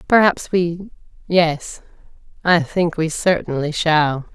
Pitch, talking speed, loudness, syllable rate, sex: 165 Hz, 95 wpm, -18 LUFS, 3.5 syllables/s, female